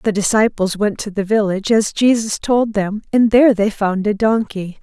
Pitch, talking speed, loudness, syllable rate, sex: 210 Hz, 200 wpm, -16 LUFS, 5.0 syllables/s, female